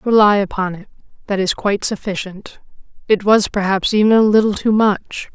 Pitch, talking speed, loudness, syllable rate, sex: 200 Hz, 170 wpm, -16 LUFS, 5.1 syllables/s, female